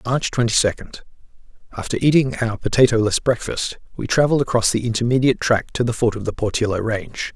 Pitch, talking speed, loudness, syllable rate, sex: 115 Hz, 165 wpm, -19 LUFS, 6.1 syllables/s, male